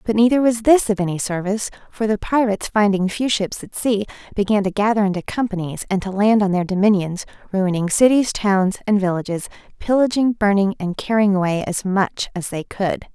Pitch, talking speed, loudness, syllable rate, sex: 205 Hz, 185 wpm, -19 LUFS, 5.4 syllables/s, female